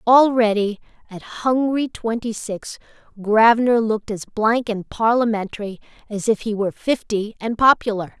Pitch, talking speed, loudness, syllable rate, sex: 220 Hz, 130 wpm, -19 LUFS, 4.8 syllables/s, female